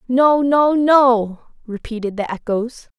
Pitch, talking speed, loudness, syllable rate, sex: 250 Hz, 120 wpm, -16 LUFS, 3.6 syllables/s, female